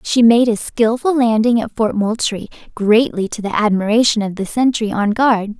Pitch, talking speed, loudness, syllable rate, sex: 220 Hz, 180 wpm, -16 LUFS, 4.8 syllables/s, female